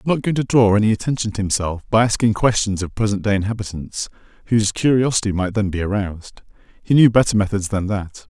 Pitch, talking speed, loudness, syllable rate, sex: 105 Hz, 210 wpm, -19 LUFS, 6.3 syllables/s, male